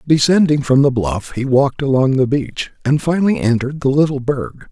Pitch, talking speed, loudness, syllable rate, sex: 140 Hz, 190 wpm, -16 LUFS, 5.5 syllables/s, male